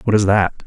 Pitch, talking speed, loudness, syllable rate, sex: 100 Hz, 270 wpm, -16 LUFS, 6.7 syllables/s, male